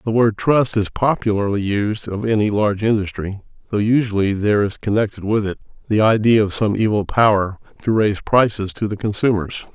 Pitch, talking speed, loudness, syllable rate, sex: 105 Hz, 180 wpm, -18 LUFS, 5.5 syllables/s, male